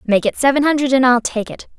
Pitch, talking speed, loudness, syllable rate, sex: 255 Hz, 270 wpm, -15 LUFS, 6.4 syllables/s, female